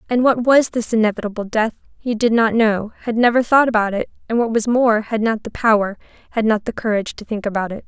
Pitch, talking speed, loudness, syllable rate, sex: 225 Hz, 230 wpm, -18 LUFS, 6.1 syllables/s, female